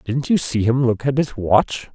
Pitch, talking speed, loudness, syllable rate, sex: 125 Hz, 245 wpm, -19 LUFS, 4.4 syllables/s, male